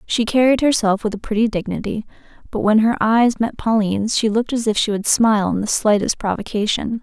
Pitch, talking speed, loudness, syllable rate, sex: 220 Hz, 205 wpm, -18 LUFS, 5.8 syllables/s, female